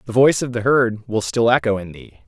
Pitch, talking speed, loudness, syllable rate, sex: 115 Hz, 265 wpm, -18 LUFS, 5.8 syllables/s, male